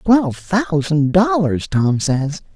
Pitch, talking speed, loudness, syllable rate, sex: 170 Hz, 120 wpm, -17 LUFS, 3.4 syllables/s, male